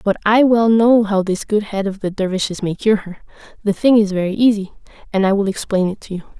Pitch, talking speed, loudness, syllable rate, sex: 205 Hz, 245 wpm, -17 LUFS, 5.9 syllables/s, female